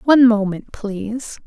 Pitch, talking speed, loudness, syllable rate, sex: 225 Hz, 125 wpm, -18 LUFS, 4.4 syllables/s, female